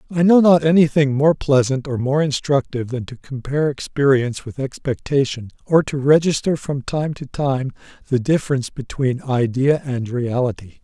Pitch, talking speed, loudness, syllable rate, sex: 135 Hz, 160 wpm, -19 LUFS, 5.1 syllables/s, male